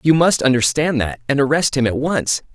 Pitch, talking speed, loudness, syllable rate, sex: 140 Hz, 210 wpm, -17 LUFS, 5.3 syllables/s, male